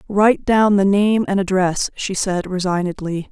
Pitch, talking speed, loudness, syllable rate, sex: 195 Hz, 165 wpm, -18 LUFS, 4.6 syllables/s, female